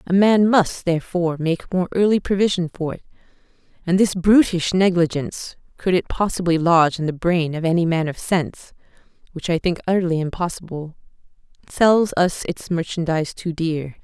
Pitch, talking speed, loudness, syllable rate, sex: 175 Hz, 160 wpm, -20 LUFS, 4.7 syllables/s, female